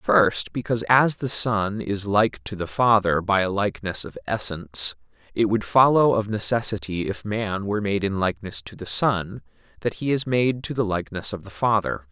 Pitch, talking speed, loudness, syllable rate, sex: 105 Hz, 195 wpm, -23 LUFS, 5.0 syllables/s, male